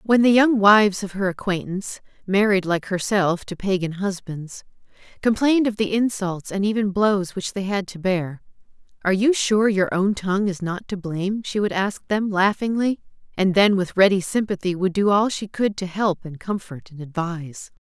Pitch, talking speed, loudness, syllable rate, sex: 195 Hz, 190 wpm, -21 LUFS, 5.0 syllables/s, female